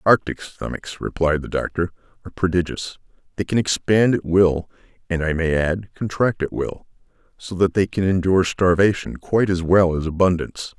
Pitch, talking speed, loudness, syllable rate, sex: 90 Hz, 165 wpm, -20 LUFS, 5.3 syllables/s, male